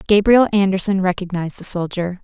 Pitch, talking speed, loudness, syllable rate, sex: 190 Hz, 135 wpm, -17 LUFS, 5.9 syllables/s, female